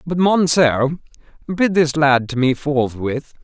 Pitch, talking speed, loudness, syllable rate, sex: 150 Hz, 140 wpm, -17 LUFS, 3.6 syllables/s, male